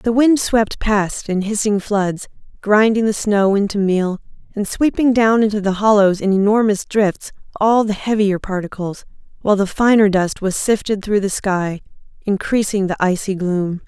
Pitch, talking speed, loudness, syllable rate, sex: 205 Hz, 165 wpm, -17 LUFS, 4.6 syllables/s, female